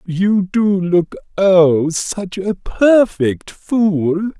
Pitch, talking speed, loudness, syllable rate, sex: 190 Hz, 110 wpm, -15 LUFS, 2.3 syllables/s, male